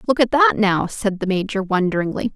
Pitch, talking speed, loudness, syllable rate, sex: 195 Hz, 205 wpm, -19 LUFS, 5.5 syllables/s, female